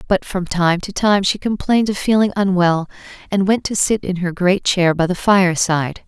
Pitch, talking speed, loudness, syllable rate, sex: 185 Hz, 205 wpm, -17 LUFS, 5.1 syllables/s, female